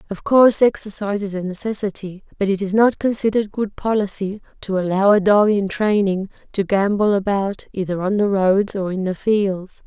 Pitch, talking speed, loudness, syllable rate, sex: 200 Hz, 185 wpm, -19 LUFS, 5.2 syllables/s, female